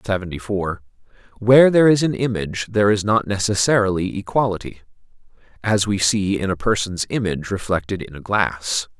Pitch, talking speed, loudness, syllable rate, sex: 100 Hz, 155 wpm, -19 LUFS, 5.7 syllables/s, male